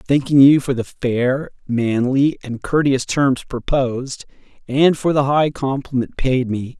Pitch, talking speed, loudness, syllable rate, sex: 130 Hz, 150 wpm, -18 LUFS, 3.9 syllables/s, male